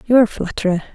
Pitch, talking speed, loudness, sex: 210 Hz, 255 wpm, -18 LUFS, female